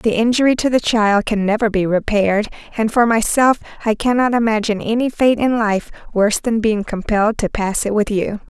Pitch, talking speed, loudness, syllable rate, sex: 220 Hz, 195 wpm, -17 LUFS, 5.5 syllables/s, female